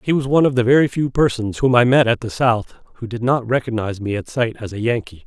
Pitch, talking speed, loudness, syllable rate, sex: 120 Hz, 275 wpm, -18 LUFS, 6.3 syllables/s, male